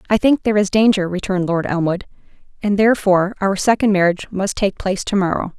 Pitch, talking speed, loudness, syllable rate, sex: 195 Hz, 195 wpm, -17 LUFS, 6.5 syllables/s, female